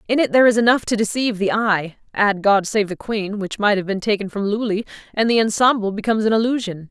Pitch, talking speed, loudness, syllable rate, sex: 210 Hz, 235 wpm, -19 LUFS, 6.2 syllables/s, female